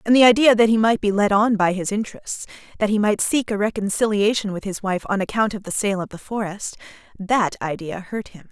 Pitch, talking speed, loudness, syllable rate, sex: 205 Hz, 225 wpm, -20 LUFS, 5.7 syllables/s, female